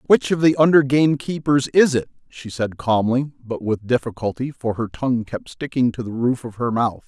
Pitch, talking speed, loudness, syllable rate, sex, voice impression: 125 Hz, 205 wpm, -20 LUFS, 5.2 syllables/s, male, masculine, middle-aged, thick, tensed, powerful, hard, raspy, mature, friendly, wild, lively, strict